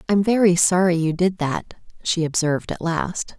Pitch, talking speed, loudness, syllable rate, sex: 175 Hz, 175 wpm, -20 LUFS, 4.7 syllables/s, female